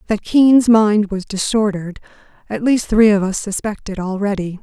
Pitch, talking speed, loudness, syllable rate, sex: 205 Hz, 155 wpm, -16 LUFS, 5.0 syllables/s, female